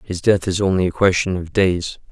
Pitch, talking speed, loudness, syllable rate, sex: 90 Hz, 225 wpm, -18 LUFS, 5.2 syllables/s, male